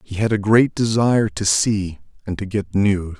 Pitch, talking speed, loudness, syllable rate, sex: 100 Hz, 205 wpm, -18 LUFS, 4.6 syllables/s, male